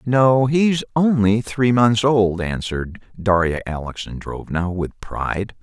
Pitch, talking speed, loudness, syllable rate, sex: 110 Hz, 115 wpm, -19 LUFS, 3.9 syllables/s, male